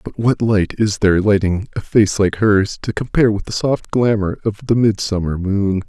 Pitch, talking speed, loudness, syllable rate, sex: 105 Hz, 205 wpm, -17 LUFS, 4.9 syllables/s, male